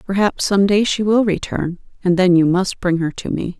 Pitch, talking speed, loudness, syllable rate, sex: 190 Hz, 235 wpm, -17 LUFS, 5.0 syllables/s, female